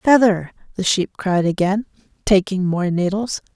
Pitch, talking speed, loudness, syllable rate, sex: 195 Hz, 135 wpm, -19 LUFS, 4.3 syllables/s, female